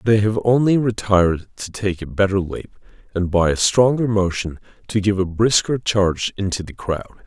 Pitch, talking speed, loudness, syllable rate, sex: 100 Hz, 180 wpm, -19 LUFS, 5.0 syllables/s, male